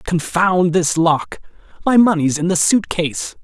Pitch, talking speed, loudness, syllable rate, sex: 170 Hz, 140 wpm, -16 LUFS, 4.0 syllables/s, male